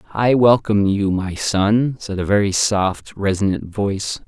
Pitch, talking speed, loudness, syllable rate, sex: 100 Hz, 155 wpm, -18 LUFS, 4.3 syllables/s, male